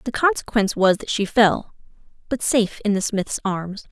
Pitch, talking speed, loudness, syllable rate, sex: 215 Hz, 170 wpm, -21 LUFS, 5.1 syllables/s, female